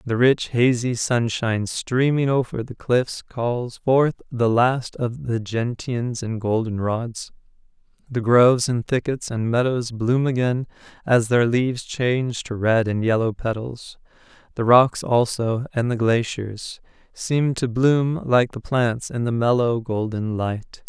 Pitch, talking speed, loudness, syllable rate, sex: 120 Hz, 145 wpm, -21 LUFS, 3.9 syllables/s, male